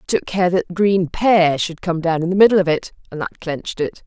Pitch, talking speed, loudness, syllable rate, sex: 175 Hz, 265 wpm, -18 LUFS, 5.5 syllables/s, female